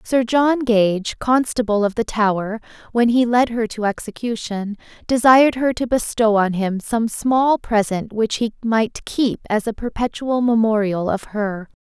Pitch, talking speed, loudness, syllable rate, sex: 225 Hz, 160 wpm, -19 LUFS, 4.3 syllables/s, female